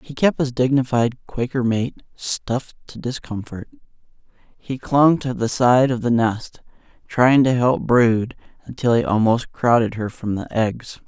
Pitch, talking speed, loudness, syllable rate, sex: 120 Hz, 155 wpm, -19 LUFS, 4.1 syllables/s, male